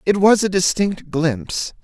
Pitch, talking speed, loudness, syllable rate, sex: 175 Hz, 165 wpm, -18 LUFS, 4.2 syllables/s, male